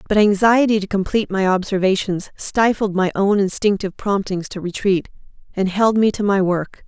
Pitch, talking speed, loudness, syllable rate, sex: 195 Hz, 165 wpm, -18 LUFS, 5.2 syllables/s, female